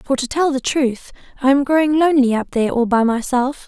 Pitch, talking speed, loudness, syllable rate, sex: 265 Hz, 230 wpm, -17 LUFS, 5.8 syllables/s, female